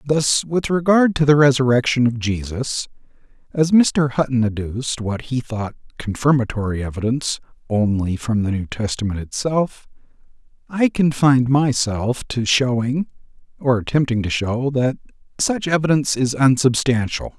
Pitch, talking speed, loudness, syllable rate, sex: 125 Hz, 130 wpm, -19 LUFS, 4.7 syllables/s, male